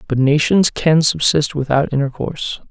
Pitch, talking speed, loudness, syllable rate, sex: 150 Hz, 135 wpm, -16 LUFS, 4.8 syllables/s, male